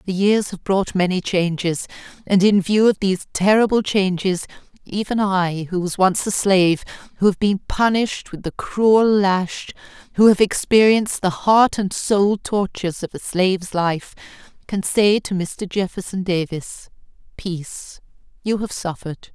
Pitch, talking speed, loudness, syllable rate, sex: 195 Hz, 155 wpm, -19 LUFS, 4.5 syllables/s, female